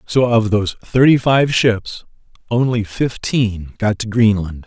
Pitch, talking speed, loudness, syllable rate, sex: 110 Hz, 140 wpm, -16 LUFS, 3.9 syllables/s, male